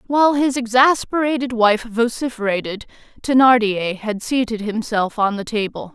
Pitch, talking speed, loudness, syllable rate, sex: 230 Hz, 120 wpm, -18 LUFS, 4.8 syllables/s, female